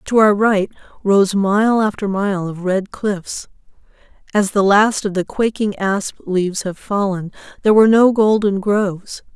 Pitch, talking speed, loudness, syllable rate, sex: 200 Hz, 160 wpm, -17 LUFS, 4.4 syllables/s, female